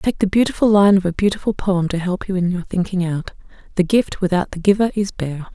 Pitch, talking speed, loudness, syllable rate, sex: 190 Hz, 240 wpm, -18 LUFS, 5.8 syllables/s, female